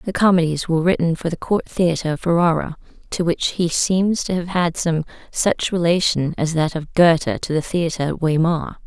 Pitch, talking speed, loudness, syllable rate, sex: 170 Hz, 195 wpm, -19 LUFS, 5.1 syllables/s, female